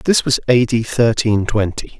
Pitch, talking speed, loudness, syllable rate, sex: 115 Hz, 180 wpm, -16 LUFS, 4.3 syllables/s, male